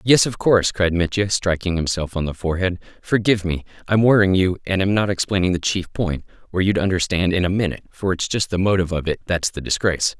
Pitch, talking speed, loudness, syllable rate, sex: 95 Hz, 225 wpm, -20 LUFS, 6.2 syllables/s, male